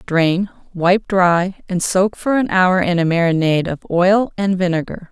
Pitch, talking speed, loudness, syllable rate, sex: 180 Hz, 175 wpm, -17 LUFS, 4.3 syllables/s, female